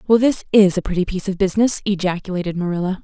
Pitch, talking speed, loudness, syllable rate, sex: 190 Hz, 200 wpm, -18 LUFS, 7.3 syllables/s, female